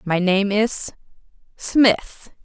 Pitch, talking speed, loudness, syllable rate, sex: 205 Hz, 75 wpm, -19 LUFS, 2.4 syllables/s, female